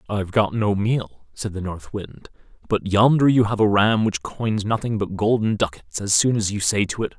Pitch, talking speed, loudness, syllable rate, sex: 105 Hz, 225 wpm, -21 LUFS, 4.9 syllables/s, male